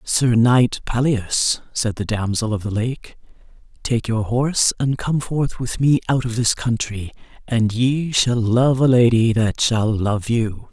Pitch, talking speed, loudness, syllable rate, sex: 120 Hz, 175 wpm, -19 LUFS, 4.0 syllables/s, female